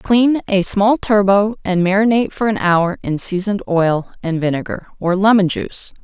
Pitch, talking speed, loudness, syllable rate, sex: 195 Hz, 170 wpm, -16 LUFS, 4.9 syllables/s, female